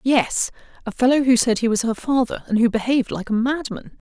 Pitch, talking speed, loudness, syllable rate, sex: 240 Hz, 220 wpm, -20 LUFS, 5.6 syllables/s, female